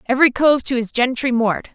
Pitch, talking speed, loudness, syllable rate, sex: 250 Hz, 205 wpm, -17 LUFS, 5.7 syllables/s, female